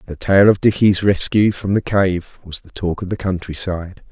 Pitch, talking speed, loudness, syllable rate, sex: 95 Hz, 205 wpm, -17 LUFS, 5.0 syllables/s, male